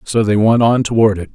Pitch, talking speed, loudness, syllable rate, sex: 110 Hz, 265 wpm, -13 LUFS, 5.7 syllables/s, male